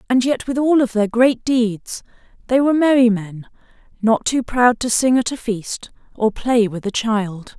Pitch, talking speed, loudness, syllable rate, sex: 235 Hz, 200 wpm, -18 LUFS, 4.4 syllables/s, female